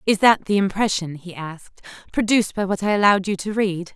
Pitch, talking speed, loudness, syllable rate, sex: 195 Hz, 215 wpm, -20 LUFS, 6.3 syllables/s, female